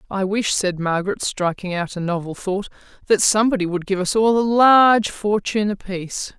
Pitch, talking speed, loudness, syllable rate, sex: 200 Hz, 180 wpm, -19 LUFS, 5.4 syllables/s, female